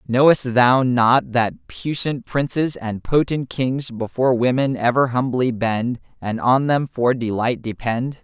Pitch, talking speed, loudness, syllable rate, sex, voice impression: 125 Hz, 145 wpm, -19 LUFS, 4.0 syllables/s, male, masculine, adult-like, clear, sincere, slightly unique